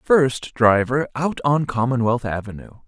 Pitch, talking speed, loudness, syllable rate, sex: 125 Hz, 125 wpm, -20 LUFS, 4.1 syllables/s, male